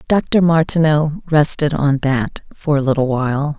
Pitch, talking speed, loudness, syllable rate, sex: 150 Hz, 150 wpm, -16 LUFS, 4.3 syllables/s, female